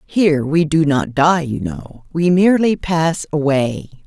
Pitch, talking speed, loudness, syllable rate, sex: 160 Hz, 160 wpm, -16 LUFS, 4.2 syllables/s, female